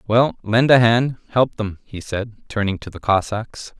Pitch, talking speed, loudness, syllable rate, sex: 110 Hz, 190 wpm, -19 LUFS, 4.4 syllables/s, male